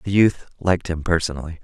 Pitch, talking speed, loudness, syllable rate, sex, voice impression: 85 Hz, 185 wpm, -21 LUFS, 6.2 syllables/s, male, very masculine, very adult-like, thick, cool, slightly intellectual, calm, slightly elegant